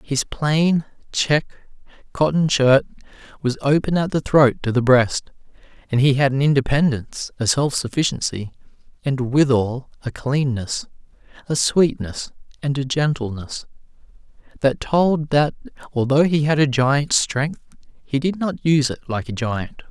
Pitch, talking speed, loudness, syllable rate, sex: 140 Hz, 140 wpm, -20 LUFS, 4.4 syllables/s, male